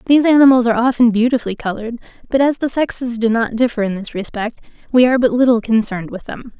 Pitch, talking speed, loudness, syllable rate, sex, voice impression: 235 Hz, 210 wpm, -15 LUFS, 6.9 syllables/s, female, feminine, adult-like, fluent, slightly sincere, calm, slightly friendly, slightly reassuring, slightly kind